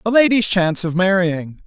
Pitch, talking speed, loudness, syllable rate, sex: 190 Hz, 180 wpm, -16 LUFS, 5.2 syllables/s, male